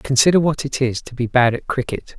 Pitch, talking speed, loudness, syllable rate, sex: 130 Hz, 245 wpm, -18 LUFS, 5.6 syllables/s, male